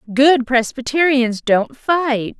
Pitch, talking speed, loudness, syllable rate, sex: 255 Hz, 100 wpm, -16 LUFS, 3.3 syllables/s, female